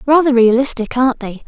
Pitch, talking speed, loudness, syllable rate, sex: 250 Hz, 160 wpm, -13 LUFS, 6.0 syllables/s, female